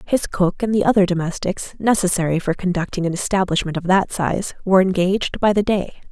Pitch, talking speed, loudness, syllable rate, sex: 185 Hz, 185 wpm, -19 LUFS, 5.8 syllables/s, female